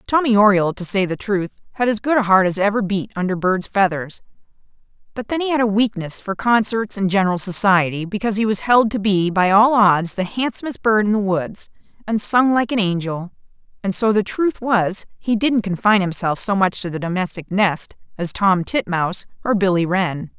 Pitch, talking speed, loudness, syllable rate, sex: 200 Hz, 205 wpm, -18 LUFS, 5.3 syllables/s, female